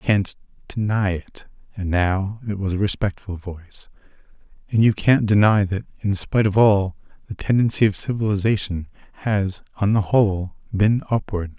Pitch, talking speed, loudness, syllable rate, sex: 100 Hz, 150 wpm, -21 LUFS, 4.1 syllables/s, male